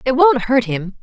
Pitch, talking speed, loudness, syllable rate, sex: 245 Hz, 235 wpm, -16 LUFS, 4.4 syllables/s, female